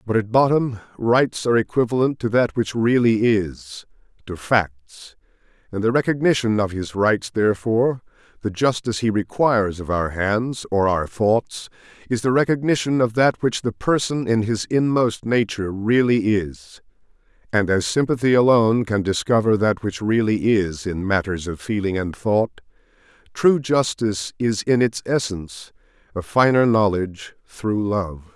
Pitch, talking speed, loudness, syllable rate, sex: 110 Hz, 150 wpm, -20 LUFS, 4.6 syllables/s, male